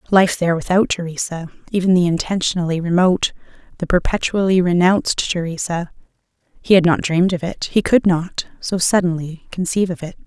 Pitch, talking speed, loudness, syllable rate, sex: 175 Hz, 145 wpm, -18 LUFS, 5.8 syllables/s, female